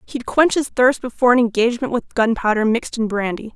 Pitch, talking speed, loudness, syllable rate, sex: 235 Hz, 200 wpm, -18 LUFS, 6.2 syllables/s, female